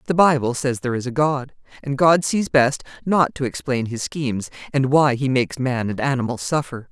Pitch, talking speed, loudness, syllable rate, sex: 135 Hz, 210 wpm, -20 LUFS, 5.3 syllables/s, female